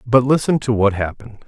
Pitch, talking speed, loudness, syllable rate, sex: 115 Hz, 205 wpm, -17 LUFS, 6.1 syllables/s, male